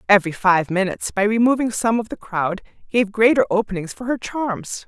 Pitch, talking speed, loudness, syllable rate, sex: 210 Hz, 185 wpm, -20 LUFS, 5.5 syllables/s, female